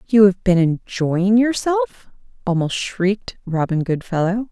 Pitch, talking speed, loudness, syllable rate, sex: 195 Hz, 120 wpm, -19 LUFS, 4.4 syllables/s, female